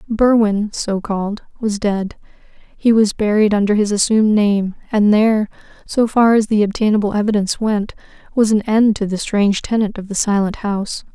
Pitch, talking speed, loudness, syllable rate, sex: 210 Hz, 160 wpm, -16 LUFS, 5.2 syllables/s, female